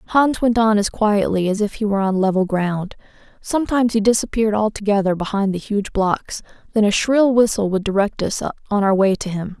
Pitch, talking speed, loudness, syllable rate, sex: 210 Hz, 200 wpm, -18 LUFS, 5.5 syllables/s, female